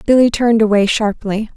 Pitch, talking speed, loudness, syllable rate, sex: 220 Hz, 155 wpm, -14 LUFS, 5.8 syllables/s, female